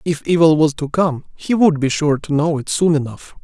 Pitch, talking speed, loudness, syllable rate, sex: 155 Hz, 245 wpm, -16 LUFS, 5.1 syllables/s, male